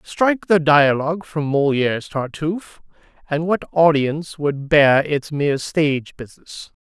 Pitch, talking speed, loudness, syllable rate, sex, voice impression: 150 Hz, 130 wpm, -18 LUFS, 4.6 syllables/s, male, masculine, adult-like, refreshing, slightly sincere, friendly, slightly unique